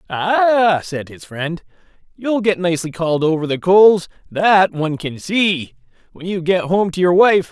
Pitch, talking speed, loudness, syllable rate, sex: 180 Hz, 175 wpm, -16 LUFS, 4.5 syllables/s, male